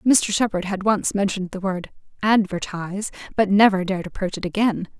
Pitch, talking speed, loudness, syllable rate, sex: 195 Hz, 170 wpm, -21 LUFS, 5.6 syllables/s, female